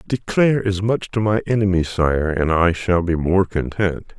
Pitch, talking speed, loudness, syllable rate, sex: 95 Hz, 185 wpm, -19 LUFS, 4.5 syllables/s, male